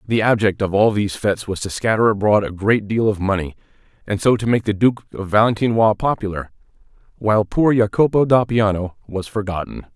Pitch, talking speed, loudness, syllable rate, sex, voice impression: 105 Hz, 180 wpm, -18 LUFS, 5.7 syllables/s, male, very masculine, very adult-like, very middle-aged, very thick, tensed, powerful, slightly dark, hard, slightly muffled, fluent, slightly raspy, very cool, intellectual, very sincere, calm, mature, friendly, reassuring, unique, elegant, slightly wild, sweet, lively, kind